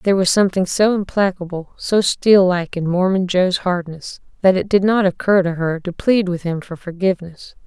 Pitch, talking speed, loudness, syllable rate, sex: 185 Hz, 195 wpm, -17 LUFS, 5.1 syllables/s, female